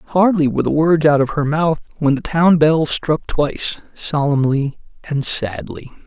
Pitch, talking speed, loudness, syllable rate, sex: 150 Hz, 170 wpm, -17 LUFS, 4.3 syllables/s, male